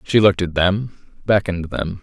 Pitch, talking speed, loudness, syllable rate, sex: 95 Hz, 175 wpm, -19 LUFS, 5.6 syllables/s, male